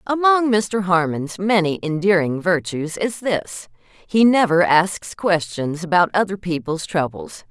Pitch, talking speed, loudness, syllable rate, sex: 185 Hz, 130 wpm, -19 LUFS, 3.9 syllables/s, female